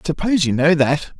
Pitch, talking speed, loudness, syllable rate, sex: 160 Hz, 250 wpm, -17 LUFS, 6.7 syllables/s, male